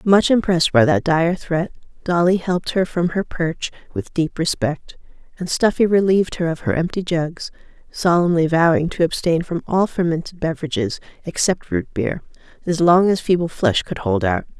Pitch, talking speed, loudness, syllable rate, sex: 170 Hz, 175 wpm, -19 LUFS, 5.0 syllables/s, female